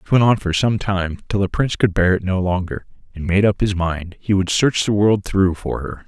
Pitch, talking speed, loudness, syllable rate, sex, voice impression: 95 Hz, 265 wpm, -19 LUFS, 5.2 syllables/s, male, masculine, middle-aged, powerful, slightly hard, muffled, raspy, calm, mature, wild, slightly lively, slightly strict, slightly modest